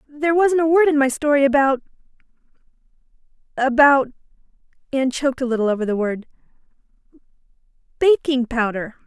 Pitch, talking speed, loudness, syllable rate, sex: 270 Hz, 105 wpm, -18 LUFS, 6.3 syllables/s, female